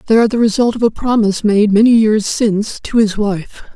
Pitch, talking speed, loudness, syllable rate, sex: 215 Hz, 225 wpm, -13 LUFS, 6.1 syllables/s, female